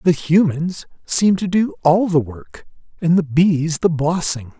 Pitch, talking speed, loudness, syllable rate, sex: 165 Hz, 170 wpm, -17 LUFS, 3.9 syllables/s, male